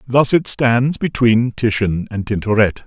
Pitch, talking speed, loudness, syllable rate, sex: 115 Hz, 145 wpm, -16 LUFS, 4.1 syllables/s, male